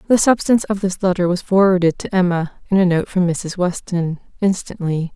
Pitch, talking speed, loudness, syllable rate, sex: 185 Hz, 185 wpm, -18 LUFS, 5.4 syllables/s, female